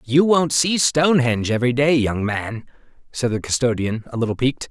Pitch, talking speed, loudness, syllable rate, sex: 130 Hz, 180 wpm, -19 LUFS, 5.6 syllables/s, male